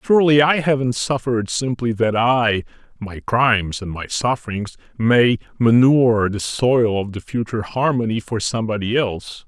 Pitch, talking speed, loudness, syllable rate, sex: 115 Hz, 145 wpm, -18 LUFS, 5.0 syllables/s, male